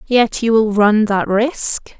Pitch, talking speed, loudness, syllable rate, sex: 220 Hz, 180 wpm, -15 LUFS, 3.3 syllables/s, female